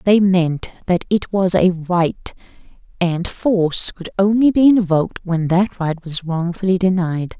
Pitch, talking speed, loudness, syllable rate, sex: 180 Hz, 155 wpm, -17 LUFS, 4.1 syllables/s, female